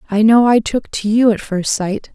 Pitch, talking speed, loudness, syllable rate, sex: 215 Hz, 250 wpm, -15 LUFS, 4.7 syllables/s, female